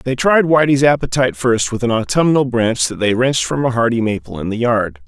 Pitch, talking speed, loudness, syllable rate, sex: 120 Hz, 225 wpm, -15 LUFS, 5.6 syllables/s, male